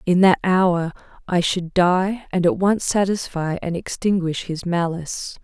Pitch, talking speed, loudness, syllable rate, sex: 180 Hz, 155 wpm, -20 LUFS, 4.2 syllables/s, female